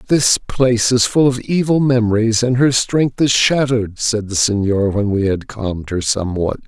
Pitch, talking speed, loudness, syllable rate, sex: 115 Hz, 190 wpm, -16 LUFS, 4.8 syllables/s, male